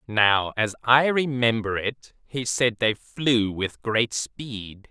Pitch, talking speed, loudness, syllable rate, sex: 115 Hz, 145 wpm, -23 LUFS, 3.1 syllables/s, male